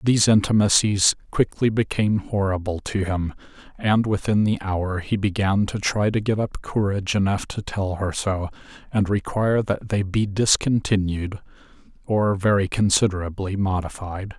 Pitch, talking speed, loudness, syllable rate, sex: 100 Hz, 140 wpm, -22 LUFS, 4.7 syllables/s, male